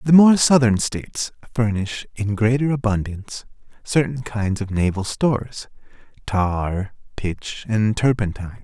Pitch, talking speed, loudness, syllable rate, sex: 115 Hz, 110 wpm, -21 LUFS, 4.3 syllables/s, male